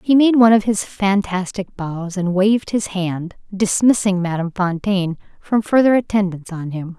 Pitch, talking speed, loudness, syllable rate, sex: 195 Hz, 165 wpm, -18 LUFS, 5.0 syllables/s, female